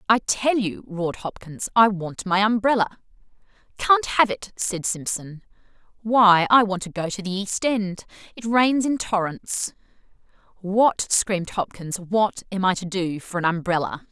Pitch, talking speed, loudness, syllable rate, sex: 200 Hz, 155 wpm, -22 LUFS, 4.3 syllables/s, female